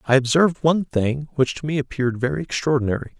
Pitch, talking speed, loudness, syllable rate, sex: 140 Hz, 190 wpm, -21 LUFS, 6.9 syllables/s, male